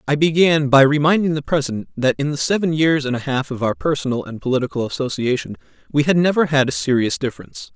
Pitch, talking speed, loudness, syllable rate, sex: 145 Hz, 210 wpm, -18 LUFS, 6.4 syllables/s, male